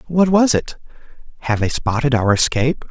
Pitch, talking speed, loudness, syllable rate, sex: 135 Hz, 165 wpm, -17 LUFS, 5.3 syllables/s, male